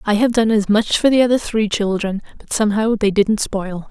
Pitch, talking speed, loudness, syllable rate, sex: 215 Hz, 230 wpm, -17 LUFS, 5.3 syllables/s, female